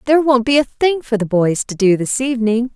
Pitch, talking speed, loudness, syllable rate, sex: 240 Hz, 260 wpm, -16 LUFS, 5.8 syllables/s, female